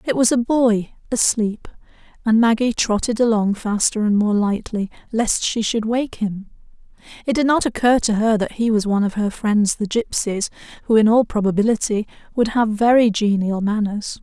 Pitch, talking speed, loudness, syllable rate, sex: 220 Hz, 175 wpm, -19 LUFS, 4.9 syllables/s, female